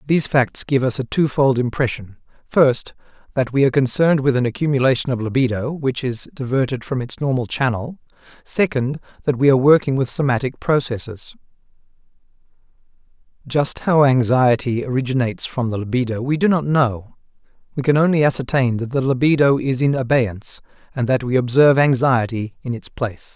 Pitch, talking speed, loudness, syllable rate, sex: 130 Hz, 155 wpm, -18 LUFS, 5.6 syllables/s, male